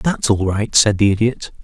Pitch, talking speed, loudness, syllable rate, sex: 105 Hz, 220 wpm, -16 LUFS, 4.6 syllables/s, male